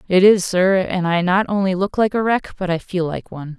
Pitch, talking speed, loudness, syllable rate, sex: 185 Hz, 270 wpm, -18 LUFS, 5.5 syllables/s, female